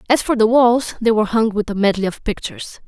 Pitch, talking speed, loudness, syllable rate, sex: 225 Hz, 250 wpm, -17 LUFS, 6.1 syllables/s, female